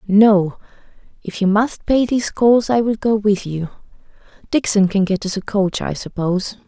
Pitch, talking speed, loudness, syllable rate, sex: 205 Hz, 180 wpm, -17 LUFS, 4.7 syllables/s, female